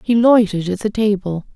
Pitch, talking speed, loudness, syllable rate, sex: 205 Hz, 195 wpm, -16 LUFS, 5.7 syllables/s, female